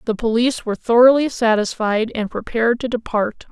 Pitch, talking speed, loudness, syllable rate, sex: 230 Hz, 155 wpm, -18 LUFS, 5.7 syllables/s, female